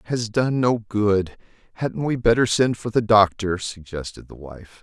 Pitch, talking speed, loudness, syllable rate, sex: 105 Hz, 185 wpm, -21 LUFS, 4.4 syllables/s, male